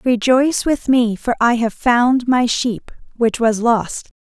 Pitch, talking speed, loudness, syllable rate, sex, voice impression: 240 Hz, 170 wpm, -16 LUFS, 3.7 syllables/s, female, feminine, adult-like, slightly soft, slightly muffled, sincere, slightly calm, friendly, slightly kind